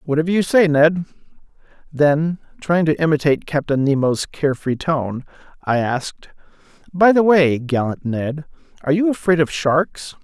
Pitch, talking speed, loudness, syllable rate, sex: 155 Hz, 140 wpm, -18 LUFS, 4.7 syllables/s, male